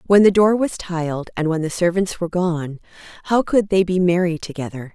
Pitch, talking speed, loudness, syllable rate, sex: 175 Hz, 205 wpm, -19 LUFS, 5.4 syllables/s, female